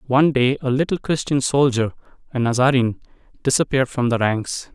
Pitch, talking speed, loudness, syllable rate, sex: 130 Hz, 125 wpm, -20 LUFS, 5.9 syllables/s, male